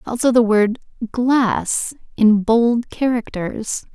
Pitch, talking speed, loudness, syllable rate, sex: 230 Hz, 105 wpm, -18 LUFS, 3.1 syllables/s, female